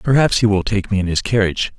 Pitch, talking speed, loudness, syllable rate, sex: 105 Hz, 270 wpm, -17 LUFS, 6.6 syllables/s, male